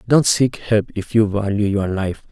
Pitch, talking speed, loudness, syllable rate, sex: 105 Hz, 205 wpm, -18 LUFS, 4.2 syllables/s, male